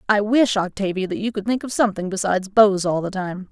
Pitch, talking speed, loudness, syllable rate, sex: 200 Hz, 240 wpm, -20 LUFS, 6.0 syllables/s, female